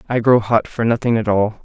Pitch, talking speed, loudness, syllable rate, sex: 110 Hz, 255 wpm, -17 LUFS, 5.5 syllables/s, male